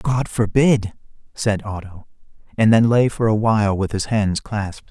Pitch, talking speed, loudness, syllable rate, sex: 105 Hz, 170 wpm, -19 LUFS, 4.6 syllables/s, male